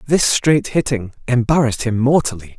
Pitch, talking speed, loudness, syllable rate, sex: 125 Hz, 140 wpm, -17 LUFS, 5.2 syllables/s, male